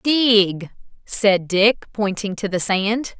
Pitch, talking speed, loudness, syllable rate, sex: 205 Hz, 130 wpm, -18 LUFS, 2.9 syllables/s, female